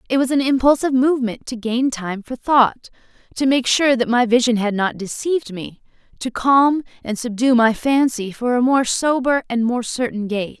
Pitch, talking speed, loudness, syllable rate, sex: 245 Hz, 180 wpm, -18 LUFS, 5.0 syllables/s, female